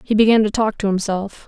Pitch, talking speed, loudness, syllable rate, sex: 210 Hz, 245 wpm, -18 LUFS, 5.8 syllables/s, female